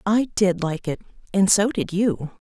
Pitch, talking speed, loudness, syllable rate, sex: 190 Hz, 170 wpm, -22 LUFS, 4.2 syllables/s, female